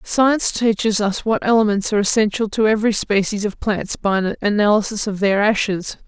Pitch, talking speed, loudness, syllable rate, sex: 210 Hz, 180 wpm, -18 LUFS, 5.5 syllables/s, female